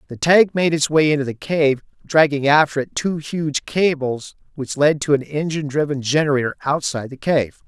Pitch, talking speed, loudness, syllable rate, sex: 145 Hz, 190 wpm, -19 LUFS, 5.3 syllables/s, male